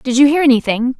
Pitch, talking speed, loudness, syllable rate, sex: 260 Hz, 240 wpm, -13 LUFS, 6.4 syllables/s, female